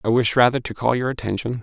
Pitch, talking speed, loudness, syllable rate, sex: 120 Hz, 260 wpm, -20 LUFS, 6.5 syllables/s, male